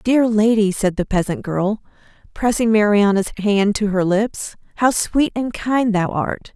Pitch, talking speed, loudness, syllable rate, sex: 210 Hz, 165 wpm, -18 LUFS, 4.1 syllables/s, female